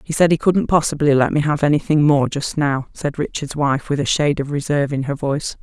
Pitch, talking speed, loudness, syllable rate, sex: 145 Hz, 245 wpm, -18 LUFS, 5.9 syllables/s, female